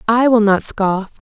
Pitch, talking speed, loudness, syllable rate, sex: 215 Hz, 190 wpm, -15 LUFS, 4.1 syllables/s, female